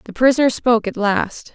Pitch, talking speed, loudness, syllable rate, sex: 230 Hz, 195 wpm, -17 LUFS, 5.7 syllables/s, female